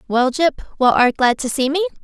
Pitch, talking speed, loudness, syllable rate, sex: 270 Hz, 235 wpm, -17 LUFS, 5.3 syllables/s, female